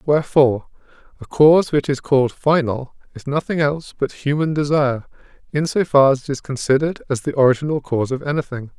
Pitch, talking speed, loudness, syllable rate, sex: 140 Hz, 185 wpm, -18 LUFS, 6.2 syllables/s, male